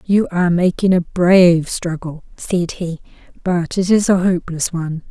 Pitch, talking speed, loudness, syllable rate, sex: 175 Hz, 165 wpm, -16 LUFS, 4.8 syllables/s, female